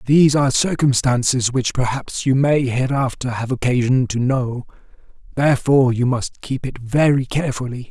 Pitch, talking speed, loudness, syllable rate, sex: 130 Hz, 145 wpm, -18 LUFS, 5.1 syllables/s, male